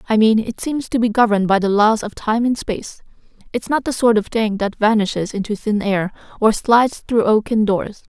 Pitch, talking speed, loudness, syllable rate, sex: 220 Hz, 220 wpm, -18 LUFS, 5.4 syllables/s, female